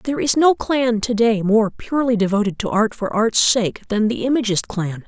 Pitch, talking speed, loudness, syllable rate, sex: 225 Hz, 215 wpm, -18 LUFS, 5.0 syllables/s, female